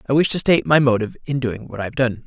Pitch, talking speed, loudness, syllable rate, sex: 130 Hz, 320 wpm, -19 LUFS, 7.3 syllables/s, male